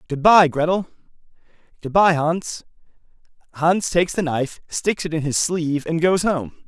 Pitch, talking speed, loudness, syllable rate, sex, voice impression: 165 Hz, 145 wpm, -19 LUFS, 4.9 syllables/s, male, masculine, adult-like, tensed, powerful, bright, clear, fluent, cool, intellectual, friendly, wild, lively, intense